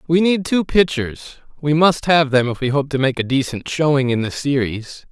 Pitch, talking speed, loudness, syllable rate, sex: 145 Hz, 210 wpm, -18 LUFS, 4.9 syllables/s, male